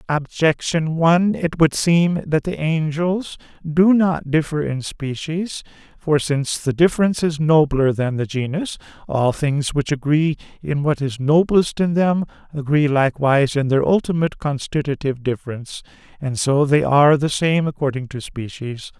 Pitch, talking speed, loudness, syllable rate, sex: 150 Hz, 150 wpm, -19 LUFS, 4.7 syllables/s, male